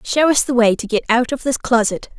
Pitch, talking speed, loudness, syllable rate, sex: 240 Hz, 275 wpm, -17 LUFS, 5.5 syllables/s, female